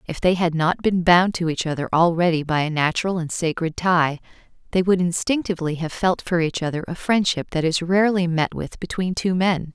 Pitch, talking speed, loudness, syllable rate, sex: 170 Hz, 210 wpm, -21 LUFS, 5.4 syllables/s, female